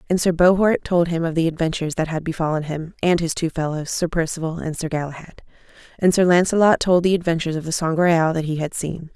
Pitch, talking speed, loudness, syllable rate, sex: 165 Hz, 225 wpm, -20 LUFS, 6.1 syllables/s, female